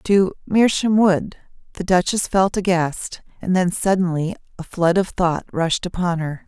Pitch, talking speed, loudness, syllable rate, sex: 180 Hz, 140 wpm, -19 LUFS, 4.2 syllables/s, female